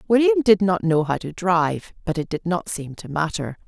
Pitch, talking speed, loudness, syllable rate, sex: 180 Hz, 230 wpm, -21 LUFS, 5.1 syllables/s, female